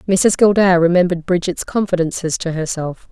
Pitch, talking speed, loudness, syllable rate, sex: 175 Hz, 135 wpm, -16 LUFS, 5.5 syllables/s, female